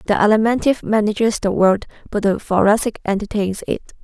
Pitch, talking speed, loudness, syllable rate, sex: 210 Hz, 150 wpm, -18 LUFS, 6.2 syllables/s, female